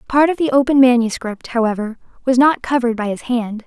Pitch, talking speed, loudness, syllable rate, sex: 245 Hz, 195 wpm, -16 LUFS, 5.9 syllables/s, female